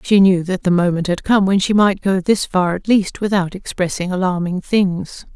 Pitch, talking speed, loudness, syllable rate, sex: 190 Hz, 215 wpm, -17 LUFS, 4.8 syllables/s, female